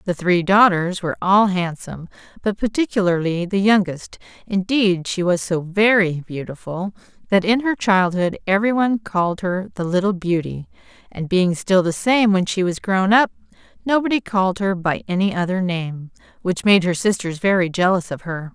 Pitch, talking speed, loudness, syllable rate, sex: 190 Hz, 170 wpm, -19 LUFS, 5.0 syllables/s, female